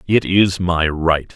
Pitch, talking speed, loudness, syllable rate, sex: 90 Hz, 180 wpm, -16 LUFS, 3.4 syllables/s, male